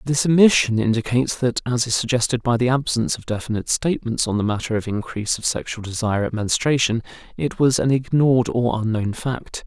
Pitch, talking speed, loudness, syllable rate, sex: 120 Hz, 185 wpm, -20 LUFS, 6.1 syllables/s, male